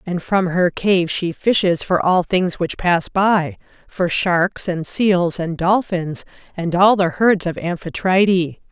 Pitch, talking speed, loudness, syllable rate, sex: 180 Hz, 165 wpm, -18 LUFS, 3.8 syllables/s, female